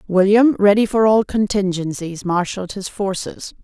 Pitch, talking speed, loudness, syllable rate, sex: 200 Hz, 130 wpm, -17 LUFS, 4.7 syllables/s, female